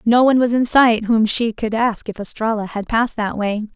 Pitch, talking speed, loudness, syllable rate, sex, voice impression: 225 Hz, 240 wpm, -18 LUFS, 5.4 syllables/s, female, very feminine, young, very thin, very tensed, very powerful, very bright, soft, very clear, very fluent, slightly raspy, very cute, intellectual, very refreshing, slightly sincere, slightly calm, very friendly, very reassuring, very unique, elegant, wild, very sweet, very lively, slightly kind, intense, sharp, very light